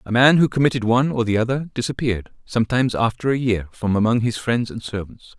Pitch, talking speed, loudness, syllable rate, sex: 120 Hz, 210 wpm, -20 LUFS, 6.5 syllables/s, male